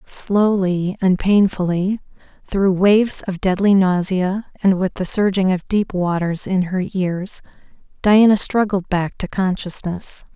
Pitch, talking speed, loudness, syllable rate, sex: 190 Hz, 135 wpm, -18 LUFS, 4.0 syllables/s, female